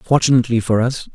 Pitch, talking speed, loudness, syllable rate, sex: 120 Hz, 155 wpm, -16 LUFS, 6.9 syllables/s, male